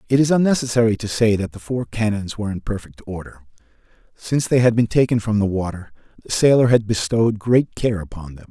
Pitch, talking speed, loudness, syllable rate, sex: 110 Hz, 205 wpm, -19 LUFS, 6.1 syllables/s, male